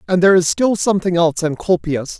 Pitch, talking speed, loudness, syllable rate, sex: 180 Hz, 190 wpm, -16 LUFS, 6.4 syllables/s, male